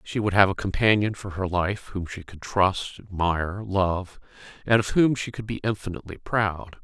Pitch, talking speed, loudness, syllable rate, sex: 100 Hz, 195 wpm, -25 LUFS, 4.9 syllables/s, male